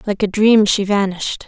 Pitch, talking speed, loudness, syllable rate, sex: 205 Hz, 205 wpm, -15 LUFS, 5.3 syllables/s, female